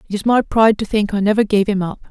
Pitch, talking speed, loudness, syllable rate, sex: 205 Hz, 315 wpm, -16 LUFS, 7.0 syllables/s, female